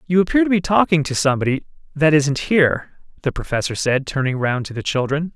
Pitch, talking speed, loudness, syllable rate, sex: 155 Hz, 190 wpm, -19 LUFS, 6.1 syllables/s, male